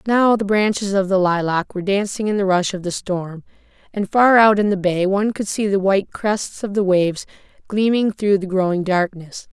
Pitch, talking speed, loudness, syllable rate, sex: 195 Hz, 215 wpm, -18 LUFS, 5.2 syllables/s, female